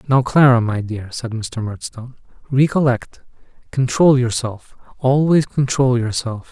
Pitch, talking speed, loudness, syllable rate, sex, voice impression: 125 Hz, 120 wpm, -17 LUFS, 4.3 syllables/s, male, very masculine, adult-like, slightly relaxed, weak, dark, soft, slightly muffled, slightly halting, slightly cool, intellectual, slightly refreshing, very sincere, calm, slightly mature, friendly, slightly reassuring, slightly unique, slightly elegant, slightly wild, sweet, slightly lively, very kind, very modest, light